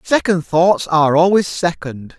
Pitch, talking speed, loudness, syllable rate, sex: 155 Hz, 135 wpm, -15 LUFS, 4.3 syllables/s, male